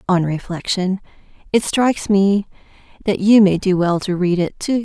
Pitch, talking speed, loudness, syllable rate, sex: 195 Hz, 175 wpm, -17 LUFS, 4.8 syllables/s, female